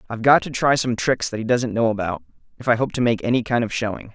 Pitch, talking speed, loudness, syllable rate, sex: 115 Hz, 290 wpm, -21 LUFS, 6.7 syllables/s, male